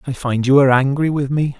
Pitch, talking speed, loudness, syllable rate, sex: 135 Hz, 265 wpm, -16 LUFS, 6.3 syllables/s, male